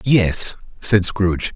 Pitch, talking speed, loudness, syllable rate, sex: 100 Hz, 115 wpm, -17 LUFS, 3.3 syllables/s, male